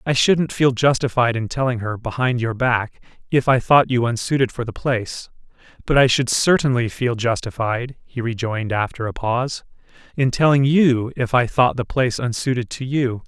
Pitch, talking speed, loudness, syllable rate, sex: 125 Hz, 180 wpm, -19 LUFS, 5.1 syllables/s, male